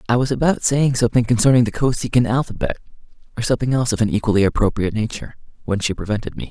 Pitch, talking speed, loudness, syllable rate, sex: 115 Hz, 195 wpm, -19 LUFS, 7.7 syllables/s, male